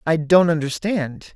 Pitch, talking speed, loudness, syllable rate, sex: 160 Hz, 135 wpm, -19 LUFS, 4.1 syllables/s, male